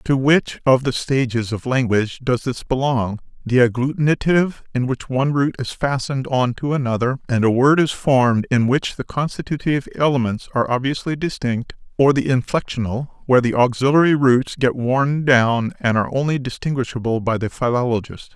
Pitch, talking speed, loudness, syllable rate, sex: 130 Hz, 165 wpm, -19 LUFS, 5.4 syllables/s, male